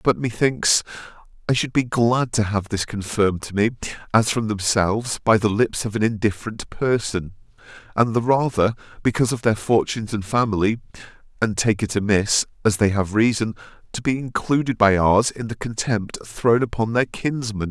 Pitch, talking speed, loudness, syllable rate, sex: 110 Hz, 175 wpm, -21 LUFS, 5.0 syllables/s, male